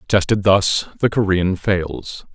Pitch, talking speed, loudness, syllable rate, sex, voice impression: 95 Hz, 130 wpm, -18 LUFS, 3.5 syllables/s, male, very masculine, very adult-like, very middle-aged, very thick, tensed, powerful, bright, hard, clear, very fluent, very cool, very intellectual, refreshing, very sincere, very calm, very mature, very friendly, very reassuring, unique, elegant, very wild, sweet, very lively, very kind